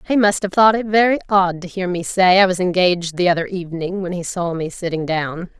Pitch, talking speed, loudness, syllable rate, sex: 185 Hz, 245 wpm, -18 LUFS, 5.7 syllables/s, female